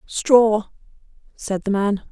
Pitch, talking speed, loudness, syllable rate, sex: 210 Hz, 115 wpm, -19 LUFS, 3.0 syllables/s, female